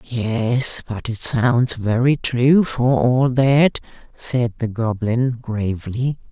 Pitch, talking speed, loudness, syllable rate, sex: 120 Hz, 125 wpm, -19 LUFS, 3.0 syllables/s, female